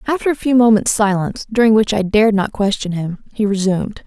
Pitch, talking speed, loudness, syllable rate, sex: 210 Hz, 205 wpm, -16 LUFS, 6.2 syllables/s, female